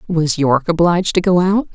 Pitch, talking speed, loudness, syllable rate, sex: 175 Hz, 205 wpm, -15 LUFS, 5.8 syllables/s, female